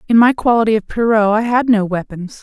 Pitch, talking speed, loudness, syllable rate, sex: 220 Hz, 220 wpm, -14 LUFS, 5.7 syllables/s, female